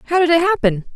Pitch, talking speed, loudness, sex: 300 Hz, 250 wpm, -16 LUFS, female